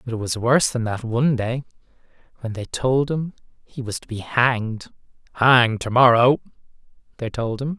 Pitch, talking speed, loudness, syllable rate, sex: 120 Hz, 175 wpm, -20 LUFS, 5.2 syllables/s, male